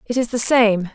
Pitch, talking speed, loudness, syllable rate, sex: 230 Hz, 255 wpm, -17 LUFS, 4.9 syllables/s, female